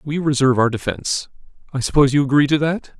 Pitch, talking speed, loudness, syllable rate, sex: 140 Hz, 180 wpm, -18 LUFS, 6.8 syllables/s, male